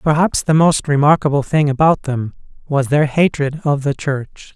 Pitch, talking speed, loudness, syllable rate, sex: 145 Hz, 170 wpm, -16 LUFS, 4.7 syllables/s, male